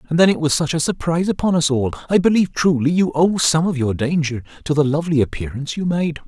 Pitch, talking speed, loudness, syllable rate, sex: 155 Hz, 230 wpm, -18 LUFS, 6.3 syllables/s, male